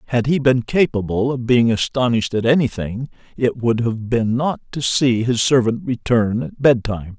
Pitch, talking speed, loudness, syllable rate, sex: 120 Hz, 175 wpm, -18 LUFS, 4.9 syllables/s, male